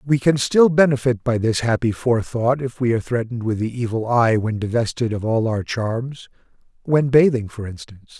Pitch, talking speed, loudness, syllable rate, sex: 120 Hz, 185 wpm, -19 LUFS, 5.4 syllables/s, male